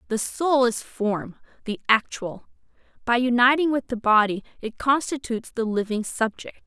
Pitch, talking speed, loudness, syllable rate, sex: 235 Hz, 145 wpm, -23 LUFS, 4.7 syllables/s, female